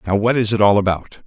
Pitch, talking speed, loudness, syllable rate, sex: 105 Hz, 285 wpm, -17 LUFS, 6.4 syllables/s, male